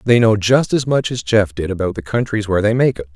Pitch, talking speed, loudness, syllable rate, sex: 110 Hz, 285 wpm, -17 LUFS, 6.1 syllables/s, male